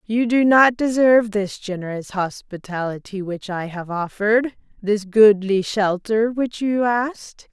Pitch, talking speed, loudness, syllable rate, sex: 210 Hz, 135 wpm, -19 LUFS, 4.2 syllables/s, female